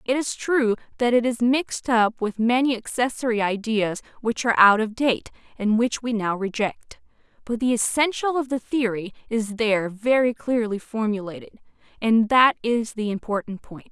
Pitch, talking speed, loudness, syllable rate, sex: 230 Hz, 170 wpm, -22 LUFS, 4.9 syllables/s, female